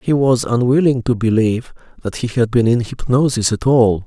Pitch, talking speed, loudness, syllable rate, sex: 120 Hz, 190 wpm, -16 LUFS, 5.2 syllables/s, male